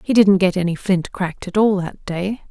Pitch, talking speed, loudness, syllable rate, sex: 190 Hz, 240 wpm, -19 LUFS, 5.1 syllables/s, female